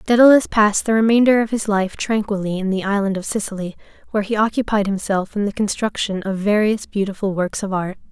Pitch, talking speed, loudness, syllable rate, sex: 205 Hz, 190 wpm, -19 LUFS, 6.0 syllables/s, female